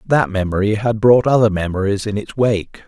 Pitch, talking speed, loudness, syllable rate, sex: 105 Hz, 190 wpm, -17 LUFS, 5.1 syllables/s, male